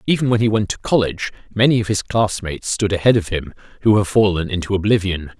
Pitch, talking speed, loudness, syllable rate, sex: 100 Hz, 210 wpm, -18 LUFS, 6.4 syllables/s, male